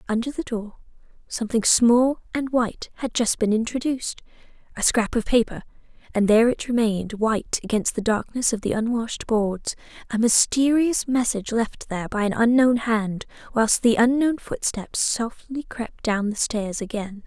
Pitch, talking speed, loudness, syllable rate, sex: 230 Hz, 150 wpm, -22 LUFS, 4.9 syllables/s, female